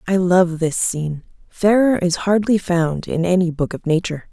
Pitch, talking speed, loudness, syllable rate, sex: 180 Hz, 180 wpm, -18 LUFS, 4.8 syllables/s, female